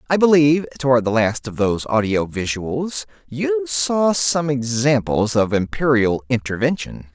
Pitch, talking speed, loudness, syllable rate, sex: 135 Hz, 135 wpm, -19 LUFS, 4.5 syllables/s, male